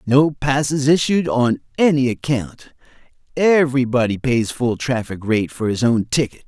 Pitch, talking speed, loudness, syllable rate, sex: 130 Hz, 140 wpm, -18 LUFS, 4.5 syllables/s, male